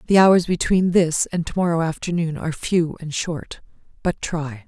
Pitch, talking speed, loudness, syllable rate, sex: 165 Hz, 180 wpm, -21 LUFS, 4.7 syllables/s, female